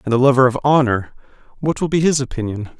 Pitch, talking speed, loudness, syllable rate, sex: 130 Hz, 195 wpm, -17 LUFS, 6.5 syllables/s, male